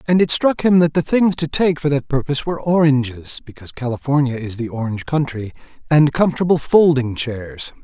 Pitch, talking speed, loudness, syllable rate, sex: 140 Hz, 170 wpm, -18 LUFS, 5.7 syllables/s, male